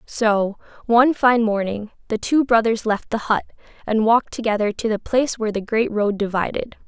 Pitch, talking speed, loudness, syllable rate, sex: 220 Hz, 185 wpm, -20 LUFS, 5.3 syllables/s, female